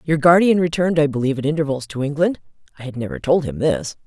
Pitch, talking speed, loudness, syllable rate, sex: 145 Hz, 220 wpm, -19 LUFS, 6.8 syllables/s, female